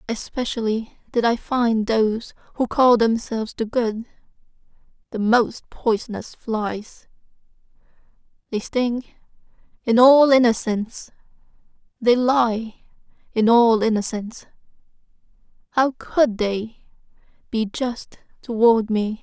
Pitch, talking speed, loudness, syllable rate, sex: 230 Hz, 95 wpm, -20 LUFS, 3.9 syllables/s, female